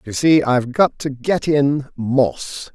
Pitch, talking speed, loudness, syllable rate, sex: 135 Hz, 175 wpm, -17 LUFS, 3.5 syllables/s, male